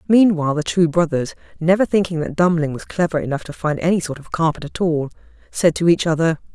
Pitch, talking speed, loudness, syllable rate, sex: 165 Hz, 210 wpm, -19 LUFS, 6.1 syllables/s, female